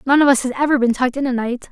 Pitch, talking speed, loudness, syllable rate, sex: 260 Hz, 350 wpm, -17 LUFS, 8.0 syllables/s, female